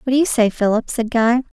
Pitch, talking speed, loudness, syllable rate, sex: 240 Hz, 265 wpm, -17 LUFS, 6.0 syllables/s, female